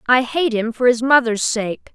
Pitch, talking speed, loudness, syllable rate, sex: 240 Hz, 215 wpm, -17 LUFS, 4.5 syllables/s, female